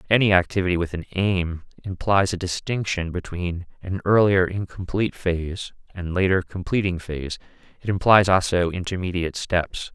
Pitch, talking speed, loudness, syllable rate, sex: 90 Hz, 135 wpm, -23 LUFS, 5.2 syllables/s, male